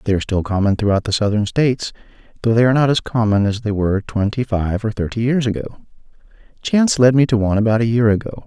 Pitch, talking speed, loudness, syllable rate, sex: 110 Hz, 225 wpm, -17 LUFS, 6.9 syllables/s, male